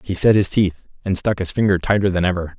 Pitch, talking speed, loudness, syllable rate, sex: 95 Hz, 255 wpm, -18 LUFS, 6.0 syllables/s, male